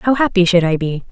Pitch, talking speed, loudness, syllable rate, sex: 190 Hz, 270 wpm, -15 LUFS, 5.8 syllables/s, female